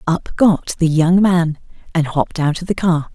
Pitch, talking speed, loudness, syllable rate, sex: 165 Hz, 210 wpm, -16 LUFS, 4.6 syllables/s, female